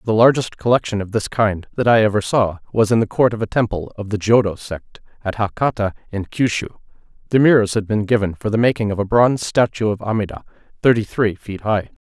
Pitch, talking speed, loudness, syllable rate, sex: 110 Hz, 215 wpm, -18 LUFS, 5.9 syllables/s, male